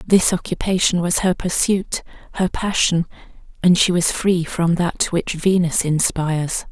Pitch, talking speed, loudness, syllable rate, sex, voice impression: 175 Hz, 145 wpm, -19 LUFS, 4.3 syllables/s, female, feminine, adult-like, thin, relaxed, slightly weak, slightly dark, muffled, raspy, calm, slightly sharp, modest